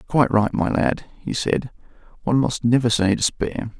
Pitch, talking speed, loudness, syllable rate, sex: 115 Hz, 175 wpm, -21 LUFS, 5.0 syllables/s, male